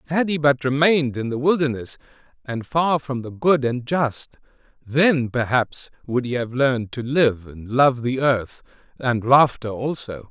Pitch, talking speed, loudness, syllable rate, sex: 130 Hz, 165 wpm, -21 LUFS, 4.3 syllables/s, male